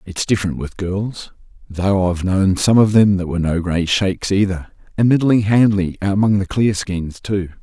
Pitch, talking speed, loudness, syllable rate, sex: 95 Hz, 175 wpm, -17 LUFS, 4.9 syllables/s, male